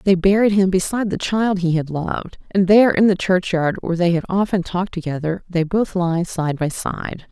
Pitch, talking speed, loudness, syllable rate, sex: 185 Hz, 215 wpm, -19 LUFS, 5.3 syllables/s, female